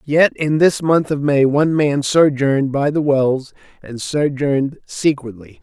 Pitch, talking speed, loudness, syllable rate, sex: 145 Hz, 160 wpm, -16 LUFS, 4.2 syllables/s, male